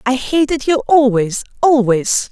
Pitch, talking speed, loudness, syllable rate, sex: 255 Hz, 130 wpm, -14 LUFS, 4.0 syllables/s, female